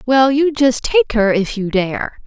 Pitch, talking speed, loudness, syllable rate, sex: 245 Hz, 210 wpm, -15 LUFS, 3.8 syllables/s, female